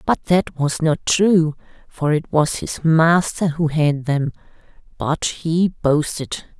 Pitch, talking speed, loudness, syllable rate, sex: 155 Hz, 145 wpm, -19 LUFS, 3.4 syllables/s, female